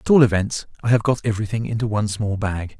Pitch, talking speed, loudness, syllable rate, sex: 110 Hz, 235 wpm, -21 LUFS, 6.6 syllables/s, male